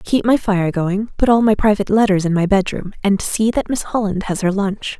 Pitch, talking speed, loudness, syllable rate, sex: 200 Hz, 240 wpm, -17 LUFS, 5.3 syllables/s, female